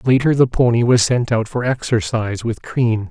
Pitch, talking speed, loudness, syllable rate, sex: 120 Hz, 195 wpm, -17 LUFS, 5.0 syllables/s, male